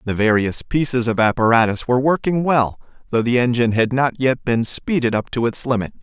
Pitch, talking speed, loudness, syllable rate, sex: 120 Hz, 200 wpm, -18 LUFS, 5.7 syllables/s, male